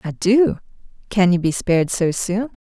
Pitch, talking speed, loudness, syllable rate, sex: 195 Hz, 185 wpm, -18 LUFS, 4.7 syllables/s, female